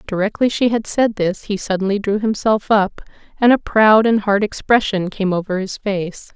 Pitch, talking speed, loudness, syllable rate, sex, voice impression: 205 Hz, 200 wpm, -17 LUFS, 4.9 syllables/s, female, feminine, adult-like, tensed, powerful, clear, fluent, intellectual, friendly, elegant, lively, slightly intense